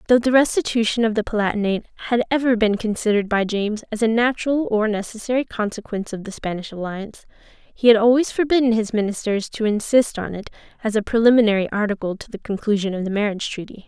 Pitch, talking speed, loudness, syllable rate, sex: 220 Hz, 185 wpm, -20 LUFS, 6.7 syllables/s, female